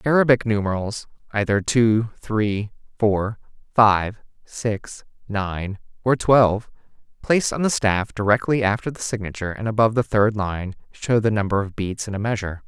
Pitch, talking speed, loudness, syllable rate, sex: 110 Hz, 150 wpm, -21 LUFS, 4.8 syllables/s, male